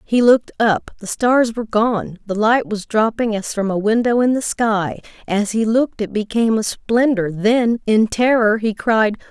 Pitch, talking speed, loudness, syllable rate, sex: 220 Hz, 195 wpm, -17 LUFS, 4.6 syllables/s, female